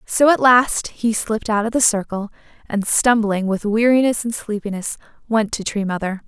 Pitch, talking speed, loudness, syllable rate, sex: 220 Hz, 180 wpm, -18 LUFS, 4.9 syllables/s, female